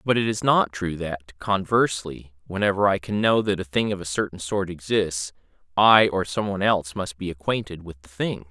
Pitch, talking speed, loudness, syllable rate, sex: 95 Hz, 210 wpm, -23 LUFS, 5.3 syllables/s, male